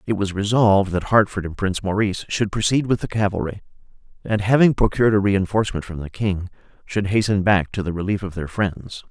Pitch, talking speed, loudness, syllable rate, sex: 100 Hz, 200 wpm, -20 LUFS, 5.9 syllables/s, male